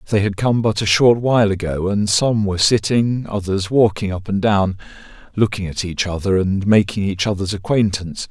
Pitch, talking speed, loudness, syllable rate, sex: 100 Hz, 190 wpm, -18 LUFS, 5.2 syllables/s, male